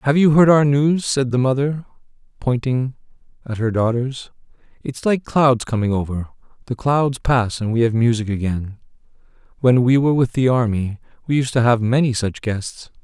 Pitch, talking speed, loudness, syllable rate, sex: 125 Hz, 175 wpm, -18 LUFS, 4.9 syllables/s, male